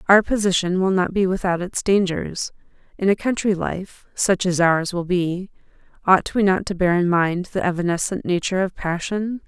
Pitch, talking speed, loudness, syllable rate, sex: 185 Hz, 185 wpm, -21 LUFS, 4.9 syllables/s, female